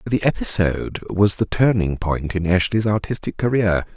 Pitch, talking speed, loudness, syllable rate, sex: 100 Hz, 150 wpm, -20 LUFS, 4.9 syllables/s, male